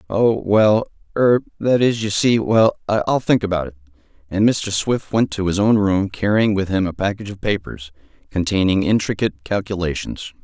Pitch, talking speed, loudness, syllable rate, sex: 100 Hz, 160 wpm, -19 LUFS, 5.0 syllables/s, male